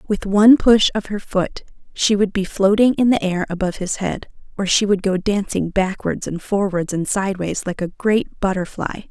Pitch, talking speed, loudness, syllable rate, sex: 195 Hz, 200 wpm, -19 LUFS, 4.9 syllables/s, female